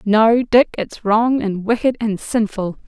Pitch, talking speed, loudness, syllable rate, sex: 220 Hz, 165 wpm, -17 LUFS, 3.8 syllables/s, female